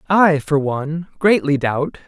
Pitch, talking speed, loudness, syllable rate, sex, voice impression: 155 Hz, 145 wpm, -18 LUFS, 4.1 syllables/s, male, masculine, adult-like, slightly middle-aged, slightly thick, tensed, bright, soft, clear, fluent, cool, very intellectual, very refreshing, sincere, calm, very friendly, reassuring, sweet, kind